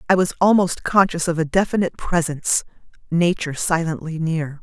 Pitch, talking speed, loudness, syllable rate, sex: 170 Hz, 145 wpm, -20 LUFS, 5.6 syllables/s, female